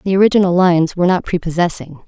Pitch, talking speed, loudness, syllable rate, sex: 180 Hz, 175 wpm, -14 LUFS, 7.2 syllables/s, female